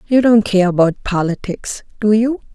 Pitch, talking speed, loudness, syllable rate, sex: 210 Hz, 165 wpm, -15 LUFS, 4.7 syllables/s, female